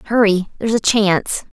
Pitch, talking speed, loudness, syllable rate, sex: 205 Hz, 150 wpm, -16 LUFS, 6.0 syllables/s, female